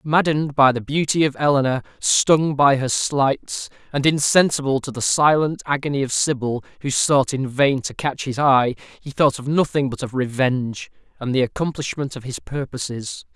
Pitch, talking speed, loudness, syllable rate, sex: 135 Hz, 175 wpm, -20 LUFS, 4.9 syllables/s, male